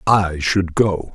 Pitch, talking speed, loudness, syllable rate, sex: 90 Hz, 155 wpm, -18 LUFS, 3.0 syllables/s, male